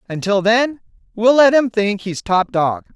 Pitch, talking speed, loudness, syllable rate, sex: 220 Hz, 185 wpm, -16 LUFS, 4.2 syllables/s, female